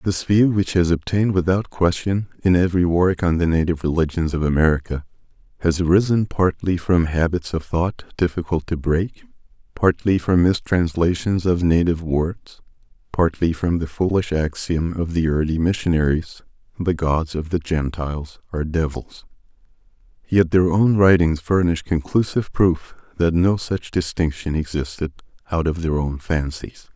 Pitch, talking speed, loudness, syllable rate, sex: 85 Hz, 145 wpm, -20 LUFS, 4.9 syllables/s, male